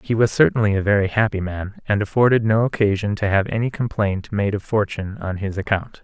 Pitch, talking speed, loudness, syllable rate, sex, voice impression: 105 Hz, 210 wpm, -20 LUFS, 5.7 syllables/s, male, masculine, adult-like, relaxed, slightly weak, hard, fluent, cool, sincere, wild, slightly strict, sharp, modest